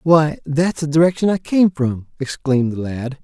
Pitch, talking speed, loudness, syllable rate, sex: 150 Hz, 185 wpm, -18 LUFS, 4.8 syllables/s, male